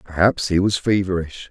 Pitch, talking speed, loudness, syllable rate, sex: 95 Hz, 160 wpm, -19 LUFS, 5.0 syllables/s, male